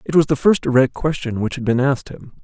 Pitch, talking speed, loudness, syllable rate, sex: 135 Hz, 270 wpm, -18 LUFS, 6.2 syllables/s, male